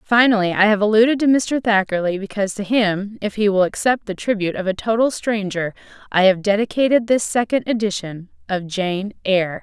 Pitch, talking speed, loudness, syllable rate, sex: 205 Hz, 170 wpm, -19 LUFS, 5.5 syllables/s, female